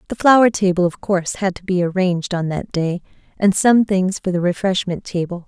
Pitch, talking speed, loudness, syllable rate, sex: 185 Hz, 210 wpm, -18 LUFS, 5.5 syllables/s, female